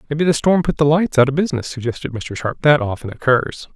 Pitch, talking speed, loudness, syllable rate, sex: 140 Hz, 240 wpm, -18 LUFS, 6.3 syllables/s, male